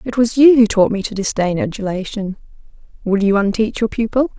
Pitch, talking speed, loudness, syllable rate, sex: 215 Hz, 190 wpm, -16 LUFS, 5.6 syllables/s, female